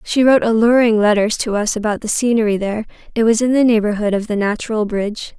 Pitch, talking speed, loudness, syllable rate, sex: 220 Hz, 210 wpm, -16 LUFS, 6.4 syllables/s, female